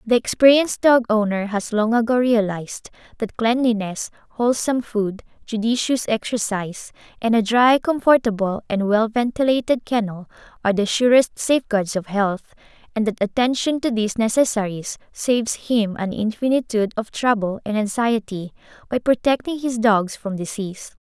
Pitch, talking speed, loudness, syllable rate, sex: 225 Hz, 135 wpm, -20 LUFS, 5.2 syllables/s, female